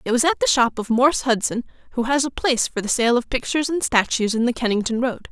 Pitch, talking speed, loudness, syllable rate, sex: 250 Hz, 260 wpm, -20 LUFS, 6.5 syllables/s, female